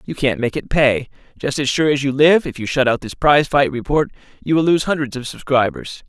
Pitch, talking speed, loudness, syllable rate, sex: 140 Hz, 245 wpm, -17 LUFS, 5.6 syllables/s, male